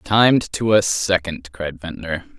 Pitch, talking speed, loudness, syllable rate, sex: 90 Hz, 150 wpm, -19 LUFS, 4.0 syllables/s, male